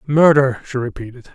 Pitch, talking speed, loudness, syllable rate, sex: 135 Hz, 135 wpm, -16 LUFS, 5.1 syllables/s, male